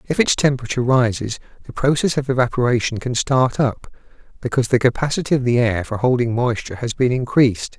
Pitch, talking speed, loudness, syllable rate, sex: 125 Hz, 175 wpm, -19 LUFS, 6.2 syllables/s, male